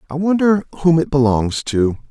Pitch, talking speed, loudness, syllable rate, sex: 145 Hz, 170 wpm, -16 LUFS, 5.0 syllables/s, male